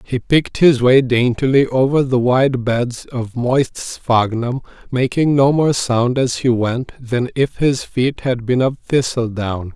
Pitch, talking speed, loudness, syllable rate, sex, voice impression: 125 Hz, 165 wpm, -17 LUFS, 3.8 syllables/s, male, masculine, slightly old, relaxed, powerful, slightly muffled, halting, raspy, calm, mature, friendly, wild, strict